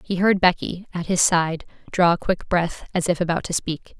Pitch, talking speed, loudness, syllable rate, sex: 175 Hz, 225 wpm, -21 LUFS, 4.9 syllables/s, female